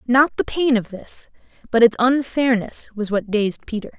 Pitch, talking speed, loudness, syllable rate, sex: 235 Hz, 180 wpm, -19 LUFS, 4.5 syllables/s, female